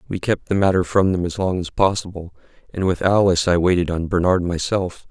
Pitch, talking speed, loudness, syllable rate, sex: 90 Hz, 210 wpm, -19 LUFS, 5.7 syllables/s, male